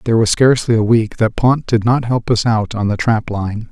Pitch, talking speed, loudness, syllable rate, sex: 115 Hz, 260 wpm, -15 LUFS, 5.3 syllables/s, male